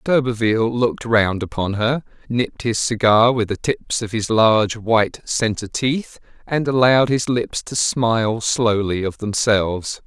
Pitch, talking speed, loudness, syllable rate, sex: 115 Hz, 155 wpm, -19 LUFS, 4.5 syllables/s, male